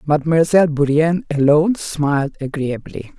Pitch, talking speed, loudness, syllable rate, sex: 150 Hz, 95 wpm, -17 LUFS, 5.3 syllables/s, female